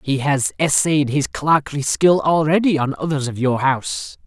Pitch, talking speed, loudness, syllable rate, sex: 140 Hz, 170 wpm, -18 LUFS, 4.5 syllables/s, male